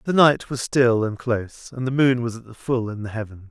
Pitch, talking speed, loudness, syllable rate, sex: 120 Hz, 275 wpm, -22 LUFS, 5.4 syllables/s, male